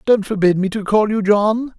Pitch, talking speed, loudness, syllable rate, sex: 210 Hz, 235 wpm, -16 LUFS, 4.9 syllables/s, male